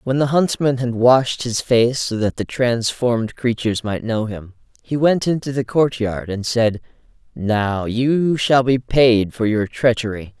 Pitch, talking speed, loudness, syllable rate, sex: 120 Hz, 175 wpm, -18 LUFS, 4.1 syllables/s, male